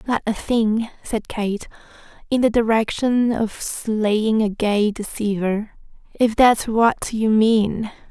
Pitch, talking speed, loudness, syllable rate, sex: 220 Hz, 135 wpm, -20 LUFS, 3.3 syllables/s, female